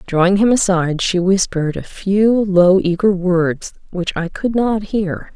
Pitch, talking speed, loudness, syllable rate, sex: 190 Hz, 170 wpm, -16 LUFS, 4.2 syllables/s, female